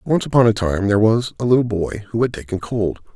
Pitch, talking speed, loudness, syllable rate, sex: 110 Hz, 250 wpm, -18 LUFS, 6.1 syllables/s, male